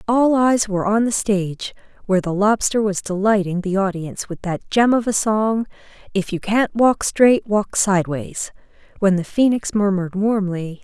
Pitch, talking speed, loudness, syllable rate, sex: 205 Hz, 170 wpm, -19 LUFS, 4.9 syllables/s, female